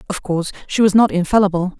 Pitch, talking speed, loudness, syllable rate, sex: 190 Hz, 200 wpm, -16 LUFS, 6.9 syllables/s, female